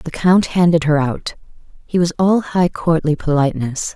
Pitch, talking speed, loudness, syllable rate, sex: 165 Hz, 165 wpm, -16 LUFS, 4.7 syllables/s, female